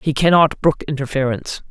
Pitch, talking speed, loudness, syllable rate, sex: 145 Hz, 140 wpm, -17 LUFS, 5.9 syllables/s, female